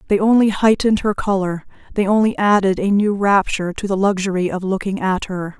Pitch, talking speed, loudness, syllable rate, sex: 195 Hz, 195 wpm, -17 LUFS, 5.7 syllables/s, female